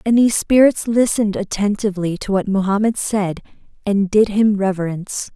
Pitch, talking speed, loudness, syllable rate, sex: 205 Hz, 145 wpm, -17 LUFS, 5.4 syllables/s, female